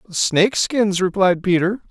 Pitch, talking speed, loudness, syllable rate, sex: 190 Hz, 125 wpm, -18 LUFS, 4.4 syllables/s, male